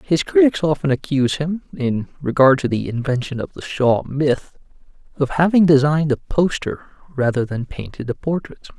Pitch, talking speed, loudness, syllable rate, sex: 145 Hz, 165 wpm, -19 LUFS, 5.1 syllables/s, male